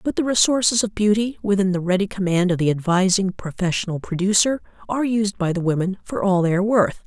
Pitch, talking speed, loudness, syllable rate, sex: 195 Hz, 205 wpm, -20 LUFS, 6.0 syllables/s, female